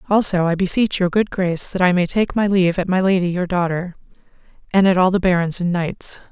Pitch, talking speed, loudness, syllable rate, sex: 185 Hz, 230 wpm, -18 LUFS, 5.9 syllables/s, female